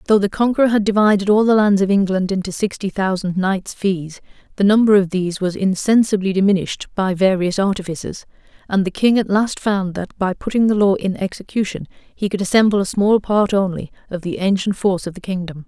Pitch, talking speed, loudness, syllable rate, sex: 195 Hz, 200 wpm, -18 LUFS, 5.7 syllables/s, female